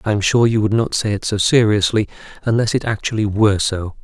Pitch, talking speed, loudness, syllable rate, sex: 105 Hz, 225 wpm, -17 LUFS, 5.9 syllables/s, male